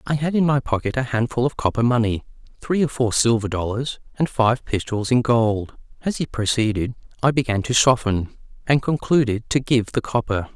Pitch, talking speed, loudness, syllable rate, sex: 120 Hz, 190 wpm, -21 LUFS, 5.3 syllables/s, male